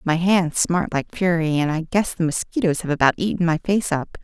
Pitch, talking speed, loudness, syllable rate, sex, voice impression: 170 Hz, 225 wpm, -20 LUFS, 5.2 syllables/s, female, feminine, adult-like, soft, slightly sincere, calm, friendly, kind